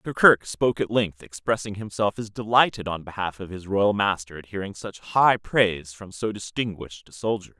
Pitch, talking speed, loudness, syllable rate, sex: 100 Hz, 190 wpm, -24 LUFS, 5.2 syllables/s, male